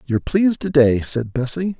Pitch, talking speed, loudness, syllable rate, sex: 145 Hz, 200 wpm, -18 LUFS, 5.4 syllables/s, male